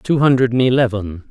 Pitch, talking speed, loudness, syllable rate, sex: 120 Hz, 140 wpm, -16 LUFS, 4.7 syllables/s, male